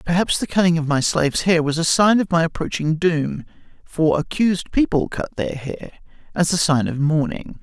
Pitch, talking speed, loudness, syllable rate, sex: 165 Hz, 195 wpm, -19 LUFS, 5.3 syllables/s, male